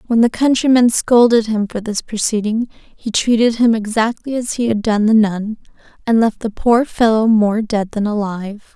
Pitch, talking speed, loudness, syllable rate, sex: 220 Hz, 185 wpm, -15 LUFS, 4.8 syllables/s, female